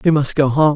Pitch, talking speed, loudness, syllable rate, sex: 145 Hz, 320 wpm, -16 LUFS, 5.7 syllables/s, male